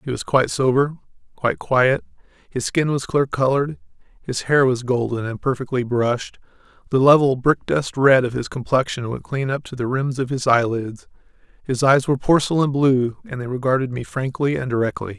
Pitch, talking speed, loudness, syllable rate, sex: 130 Hz, 185 wpm, -20 LUFS, 5.4 syllables/s, male